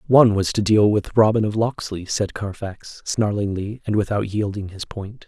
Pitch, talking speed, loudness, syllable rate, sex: 105 Hz, 180 wpm, -21 LUFS, 4.8 syllables/s, male